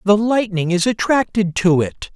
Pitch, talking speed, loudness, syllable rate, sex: 200 Hz, 165 wpm, -17 LUFS, 4.4 syllables/s, male